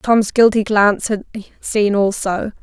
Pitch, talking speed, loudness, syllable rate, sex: 210 Hz, 135 wpm, -16 LUFS, 4.2 syllables/s, female